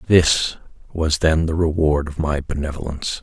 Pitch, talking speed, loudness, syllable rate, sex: 80 Hz, 150 wpm, -20 LUFS, 4.8 syllables/s, male